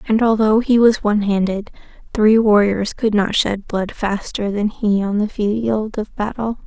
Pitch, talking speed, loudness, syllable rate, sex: 210 Hz, 180 wpm, -17 LUFS, 4.3 syllables/s, female